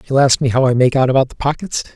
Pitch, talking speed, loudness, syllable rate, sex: 135 Hz, 305 wpm, -15 LUFS, 7.2 syllables/s, male